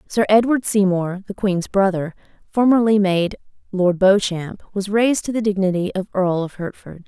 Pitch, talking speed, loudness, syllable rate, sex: 195 Hz, 160 wpm, -19 LUFS, 4.8 syllables/s, female